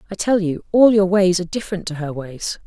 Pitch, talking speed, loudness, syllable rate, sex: 185 Hz, 245 wpm, -18 LUFS, 6.0 syllables/s, female